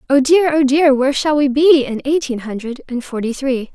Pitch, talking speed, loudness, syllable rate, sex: 275 Hz, 225 wpm, -15 LUFS, 5.2 syllables/s, female